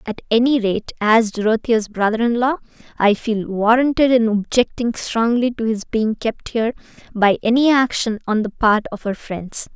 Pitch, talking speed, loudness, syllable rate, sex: 225 Hz, 170 wpm, -18 LUFS, 4.7 syllables/s, female